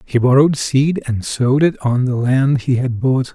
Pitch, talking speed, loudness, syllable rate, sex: 130 Hz, 215 wpm, -16 LUFS, 4.7 syllables/s, male